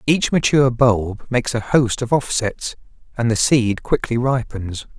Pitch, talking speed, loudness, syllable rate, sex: 120 Hz, 155 wpm, -19 LUFS, 4.4 syllables/s, male